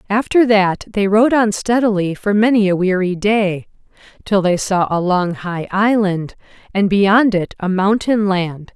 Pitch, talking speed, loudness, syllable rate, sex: 200 Hz, 165 wpm, -16 LUFS, 4.3 syllables/s, female